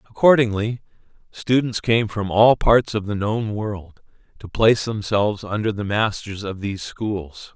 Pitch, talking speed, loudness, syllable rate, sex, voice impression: 105 Hz, 150 wpm, -20 LUFS, 4.5 syllables/s, male, masculine, adult-like, thick, tensed, powerful, slightly dark, clear, slightly nasal, cool, calm, slightly mature, reassuring, wild, lively, slightly strict